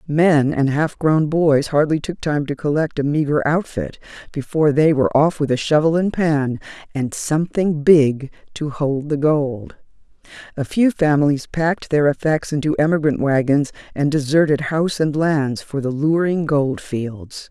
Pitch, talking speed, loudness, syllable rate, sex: 150 Hz, 160 wpm, -18 LUFS, 4.5 syllables/s, female